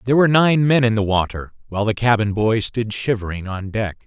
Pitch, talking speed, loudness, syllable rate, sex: 115 Hz, 220 wpm, -19 LUFS, 5.8 syllables/s, male